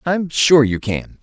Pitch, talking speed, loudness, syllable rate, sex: 140 Hz, 195 wpm, -16 LUFS, 3.7 syllables/s, male